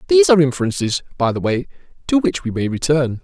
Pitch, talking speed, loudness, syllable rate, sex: 150 Hz, 205 wpm, -18 LUFS, 6.8 syllables/s, male